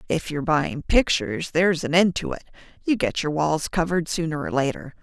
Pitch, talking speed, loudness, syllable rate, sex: 160 Hz, 190 wpm, -23 LUFS, 5.7 syllables/s, female